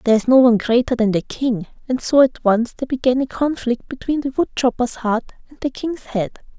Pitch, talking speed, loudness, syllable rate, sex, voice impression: 245 Hz, 230 wpm, -19 LUFS, 5.7 syllables/s, female, very feminine, young, very thin, relaxed, very weak, slightly bright, very soft, slightly muffled, very fluent, slightly raspy, very cute, intellectual, refreshing, sincere, very calm, very friendly, very reassuring, very unique, very elegant, very sweet, slightly lively, very kind, very modest, very light